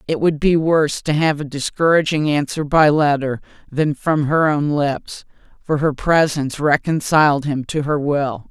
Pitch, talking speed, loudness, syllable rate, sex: 150 Hz, 170 wpm, -17 LUFS, 4.5 syllables/s, female